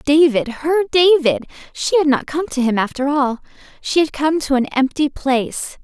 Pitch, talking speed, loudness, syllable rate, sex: 285 Hz, 165 wpm, -17 LUFS, 4.7 syllables/s, female